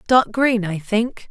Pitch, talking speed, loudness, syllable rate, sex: 220 Hz, 185 wpm, -19 LUFS, 3.5 syllables/s, female